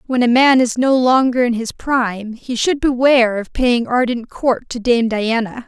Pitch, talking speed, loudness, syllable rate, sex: 245 Hz, 200 wpm, -16 LUFS, 4.6 syllables/s, female